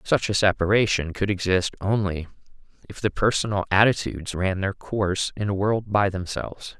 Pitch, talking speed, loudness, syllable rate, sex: 100 Hz, 160 wpm, -23 LUFS, 5.3 syllables/s, male